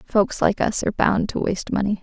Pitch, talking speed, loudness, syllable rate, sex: 205 Hz, 235 wpm, -21 LUFS, 5.7 syllables/s, female